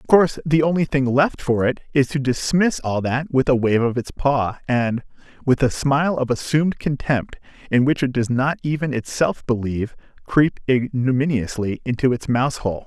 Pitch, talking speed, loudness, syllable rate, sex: 130 Hz, 185 wpm, -20 LUFS, 5.0 syllables/s, male